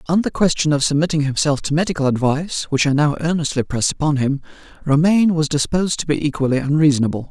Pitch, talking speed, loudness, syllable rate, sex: 150 Hz, 190 wpm, -18 LUFS, 5.5 syllables/s, male